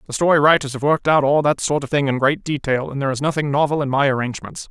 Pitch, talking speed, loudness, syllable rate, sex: 140 Hz, 280 wpm, -18 LUFS, 7.1 syllables/s, male